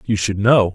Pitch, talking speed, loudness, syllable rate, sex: 105 Hz, 245 wpm, -16 LUFS, 4.6 syllables/s, male